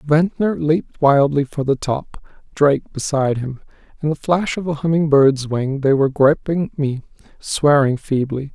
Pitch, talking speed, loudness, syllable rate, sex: 145 Hz, 160 wpm, -18 LUFS, 4.6 syllables/s, male